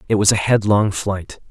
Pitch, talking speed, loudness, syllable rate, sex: 100 Hz, 200 wpm, -17 LUFS, 4.7 syllables/s, male